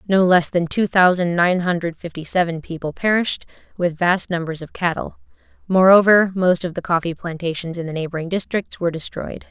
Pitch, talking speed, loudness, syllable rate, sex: 175 Hz, 175 wpm, -19 LUFS, 5.6 syllables/s, female